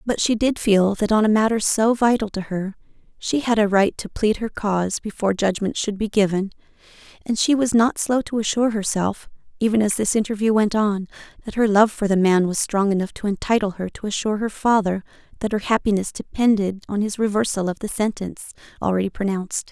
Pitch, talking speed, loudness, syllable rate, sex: 210 Hz, 205 wpm, -21 LUFS, 5.8 syllables/s, female